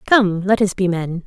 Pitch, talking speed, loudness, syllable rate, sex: 190 Hz, 240 wpm, -18 LUFS, 4.5 syllables/s, female